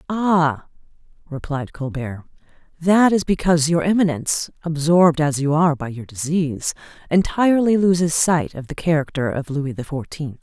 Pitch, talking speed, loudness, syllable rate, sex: 155 Hz, 145 wpm, -19 LUFS, 5.1 syllables/s, female